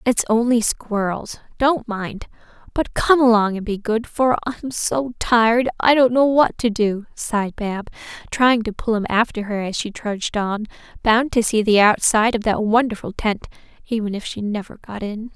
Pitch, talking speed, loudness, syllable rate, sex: 225 Hz, 190 wpm, -19 LUFS, 4.8 syllables/s, female